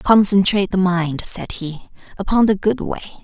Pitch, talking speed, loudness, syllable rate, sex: 190 Hz, 165 wpm, -17 LUFS, 4.8 syllables/s, female